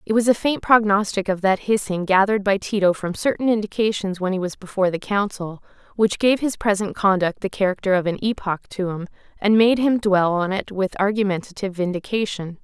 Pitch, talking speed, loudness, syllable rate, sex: 200 Hz, 195 wpm, -21 LUFS, 5.7 syllables/s, female